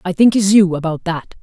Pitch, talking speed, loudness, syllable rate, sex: 185 Hz, 255 wpm, -14 LUFS, 5.4 syllables/s, female